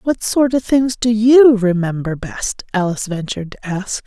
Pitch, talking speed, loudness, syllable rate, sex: 215 Hz, 175 wpm, -16 LUFS, 4.6 syllables/s, female